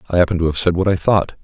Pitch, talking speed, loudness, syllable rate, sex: 90 Hz, 335 wpm, -17 LUFS, 8.1 syllables/s, male